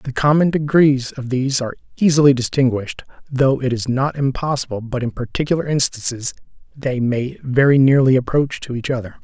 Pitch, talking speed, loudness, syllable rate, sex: 130 Hz, 165 wpm, -18 LUFS, 5.6 syllables/s, male